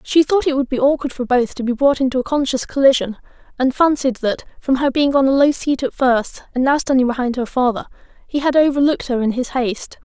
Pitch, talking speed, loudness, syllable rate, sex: 265 Hz, 230 wpm, -17 LUFS, 5.9 syllables/s, female